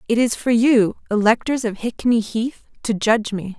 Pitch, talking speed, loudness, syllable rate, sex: 225 Hz, 185 wpm, -19 LUFS, 4.8 syllables/s, female